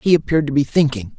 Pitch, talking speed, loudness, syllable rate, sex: 140 Hz, 250 wpm, -17 LUFS, 7.0 syllables/s, male